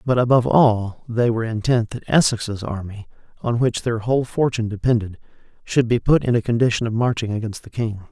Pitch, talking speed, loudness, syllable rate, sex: 115 Hz, 190 wpm, -20 LUFS, 5.7 syllables/s, male